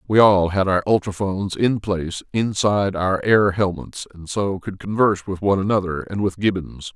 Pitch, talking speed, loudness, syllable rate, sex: 95 Hz, 180 wpm, -20 LUFS, 5.2 syllables/s, male